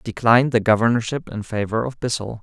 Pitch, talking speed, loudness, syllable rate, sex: 115 Hz, 175 wpm, -20 LUFS, 5.9 syllables/s, male